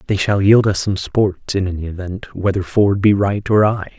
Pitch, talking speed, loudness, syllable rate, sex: 100 Hz, 225 wpm, -17 LUFS, 4.8 syllables/s, male